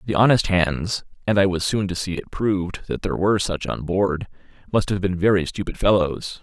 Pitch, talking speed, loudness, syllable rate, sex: 95 Hz, 195 wpm, -22 LUFS, 5.4 syllables/s, male